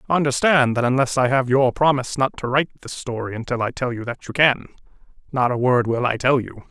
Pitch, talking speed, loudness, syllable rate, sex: 130 Hz, 235 wpm, -20 LUFS, 6.1 syllables/s, male